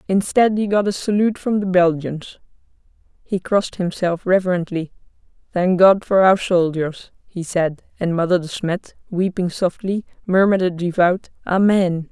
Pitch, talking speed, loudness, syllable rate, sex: 185 Hz, 145 wpm, -19 LUFS, 4.7 syllables/s, female